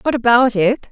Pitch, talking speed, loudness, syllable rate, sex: 235 Hz, 195 wpm, -14 LUFS, 5.1 syllables/s, female